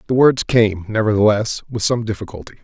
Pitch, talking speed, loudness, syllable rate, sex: 110 Hz, 160 wpm, -17 LUFS, 5.7 syllables/s, male